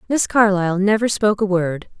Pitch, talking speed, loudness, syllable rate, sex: 200 Hz, 180 wpm, -17 LUFS, 5.8 syllables/s, female